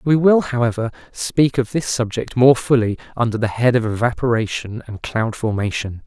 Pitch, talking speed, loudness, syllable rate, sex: 120 Hz, 170 wpm, -19 LUFS, 5.1 syllables/s, male